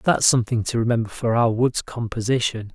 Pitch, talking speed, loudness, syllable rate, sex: 115 Hz, 175 wpm, -21 LUFS, 5.7 syllables/s, male